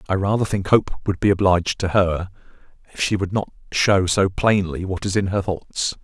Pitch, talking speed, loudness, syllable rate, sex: 95 Hz, 210 wpm, -20 LUFS, 5.2 syllables/s, male